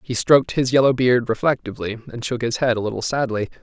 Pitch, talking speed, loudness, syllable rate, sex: 120 Hz, 215 wpm, -20 LUFS, 6.4 syllables/s, male